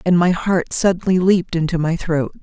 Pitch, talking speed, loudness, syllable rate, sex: 175 Hz, 200 wpm, -18 LUFS, 5.4 syllables/s, female